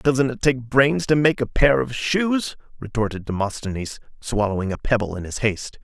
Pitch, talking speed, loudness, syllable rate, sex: 120 Hz, 185 wpm, -21 LUFS, 5.0 syllables/s, male